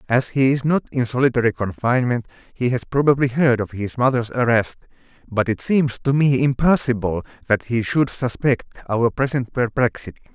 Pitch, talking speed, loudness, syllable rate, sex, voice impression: 125 Hz, 160 wpm, -20 LUFS, 5.3 syllables/s, male, masculine, adult-like, friendly, slightly unique, slightly kind